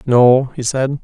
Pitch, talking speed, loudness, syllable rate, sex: 130 Hz, 175 wpm, -14 LUFS, 3.5 syllables/s, male